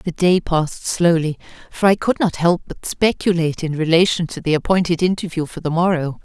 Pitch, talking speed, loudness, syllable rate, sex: 170 Hz, 190 wpm, -18 LUFS, 5.5 syllables/s, female